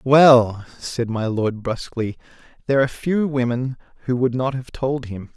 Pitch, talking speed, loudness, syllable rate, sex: 125 Hz, 170 wpm, -20 LUFS, 4.7 syllables/s, male